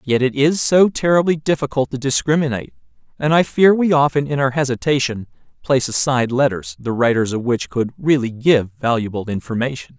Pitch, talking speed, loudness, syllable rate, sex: 135 Hz, 170 wpm, -18 LUFS, 5.7 syllables/s, male